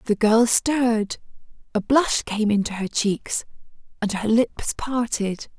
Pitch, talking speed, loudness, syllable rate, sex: 225 Hz, 140 wpm, -22 LUFS, 3.8 syllables/s, female